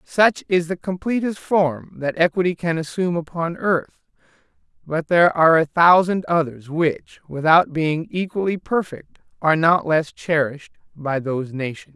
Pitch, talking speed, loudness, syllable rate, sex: 165 Hz, 145 wpm, -20 LUFS, 4.8 syllables/s, male